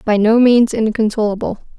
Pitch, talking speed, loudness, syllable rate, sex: 220 Hz, 135 wpm, -14 LUFS, 5.0 syllables/s, female